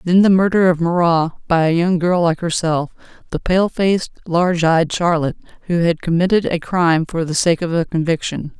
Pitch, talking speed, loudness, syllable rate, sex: 170 Hz, 195 wpm, -17 LUFS, 5.4 syllables/s, female